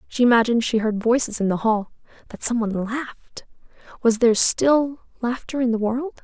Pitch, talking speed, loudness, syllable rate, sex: 235 Hz, 165 wpm, -21 LUFS, 5.5 syllables/s, female